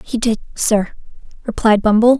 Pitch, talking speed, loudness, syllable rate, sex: 225 Hz, 135 wpm, -16 LUFS, 4.7 syllables/s, female